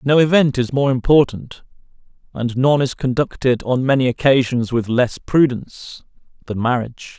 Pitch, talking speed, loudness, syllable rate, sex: 130 Hz, 140 wpm, -17 LUFS, 4.9 syllables/s, male